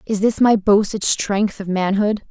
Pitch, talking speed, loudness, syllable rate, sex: 205 Hz, 185 wpm, -18 LUFS, 4.2 syllables/s, female